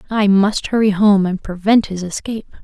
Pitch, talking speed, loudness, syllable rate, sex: 200 Hz, 180 wpm, -16 LUFS, 5.2 syllables/s, female